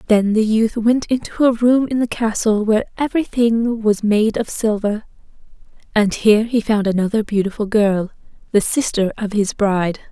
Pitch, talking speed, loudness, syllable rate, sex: 220 Hz, 165 wpm, -17 LUFS, 5.0 syllables/s, female